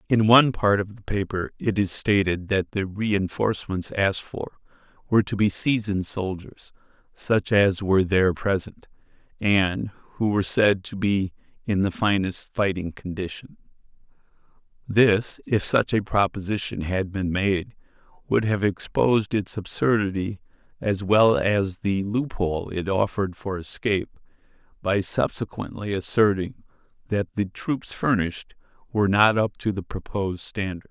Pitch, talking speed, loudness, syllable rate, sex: 100 Hz, 140 wpm, -24 LUFS, 4.7 syllables/s, male